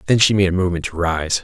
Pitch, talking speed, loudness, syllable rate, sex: 90 Hz, 295 wpm, -18 LUFS, 7.2 syllables/s, male